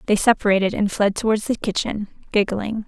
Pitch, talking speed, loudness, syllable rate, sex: 210 Hz, 165 wpm, -21 LUFS, 5.7 syllables/s, female